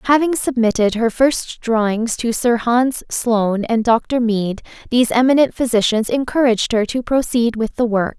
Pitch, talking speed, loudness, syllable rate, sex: 235 Hz, 160 wpm, -17 LUFS, 4.7 syllables/s, female